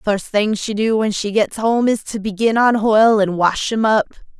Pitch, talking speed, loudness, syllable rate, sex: 215 Hz, 230 wpm, -17 LUFS, 4.7 syllables/s, female